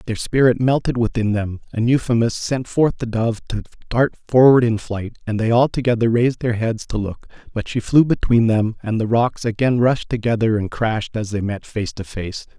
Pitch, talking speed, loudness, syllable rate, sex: 115 Hz, 210 wpm, -19 LUFS, 5.2 syllables/s, male